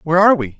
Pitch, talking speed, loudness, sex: 170 Hz, 300 wpm, -14 LUFS, male